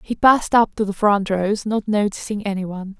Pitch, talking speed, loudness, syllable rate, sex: 205 Hz, 200 wpm, -19 LUFS, 5.3 syllables/s, female